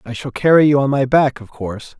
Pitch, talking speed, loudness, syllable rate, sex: 130 Hz, 270 wpm, -14 LUFS, 5.8 syllables/s, male